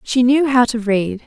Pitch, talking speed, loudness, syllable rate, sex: 240 Hz, 235 wpm, -16 LUFS, 4.4 syllables/s, female